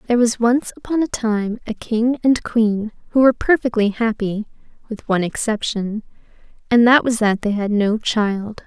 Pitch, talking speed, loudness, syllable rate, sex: 225 Hz, 175 wpm, -18 LUFS, 4.8 syllables/s, female